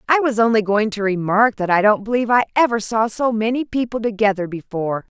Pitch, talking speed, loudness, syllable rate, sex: 220 Hz, 210 wpm, -18 LUFS, 6.0 syllables/s, female